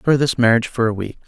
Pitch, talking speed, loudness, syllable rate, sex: 120 Hz, 285 wpm, -18 LUFS, 7.7 syllables/s, male